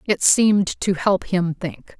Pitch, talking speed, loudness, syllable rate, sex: 180 Hz, 180 wpm, -19 LUFS, 3.7 syllables/s, female